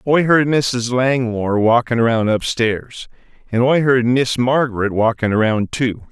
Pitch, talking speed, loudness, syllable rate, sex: 120 Hz, 145 wpm, -16 LUFS, 4.3 syllables/s, male